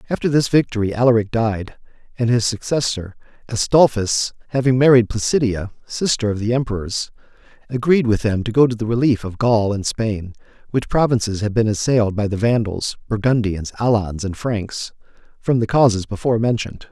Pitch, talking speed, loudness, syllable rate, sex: 115 Hz, 160 wpm, -19 LUFS, 5.4 syllables/s, male